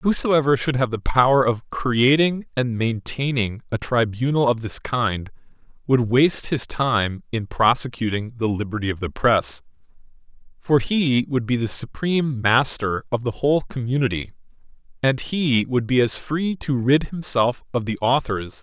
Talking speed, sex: 170 wpm, male